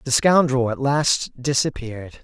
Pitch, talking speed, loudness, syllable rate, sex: 130 Hz, 135 wpm, -19 LUFS, 4.3 syllables/s, male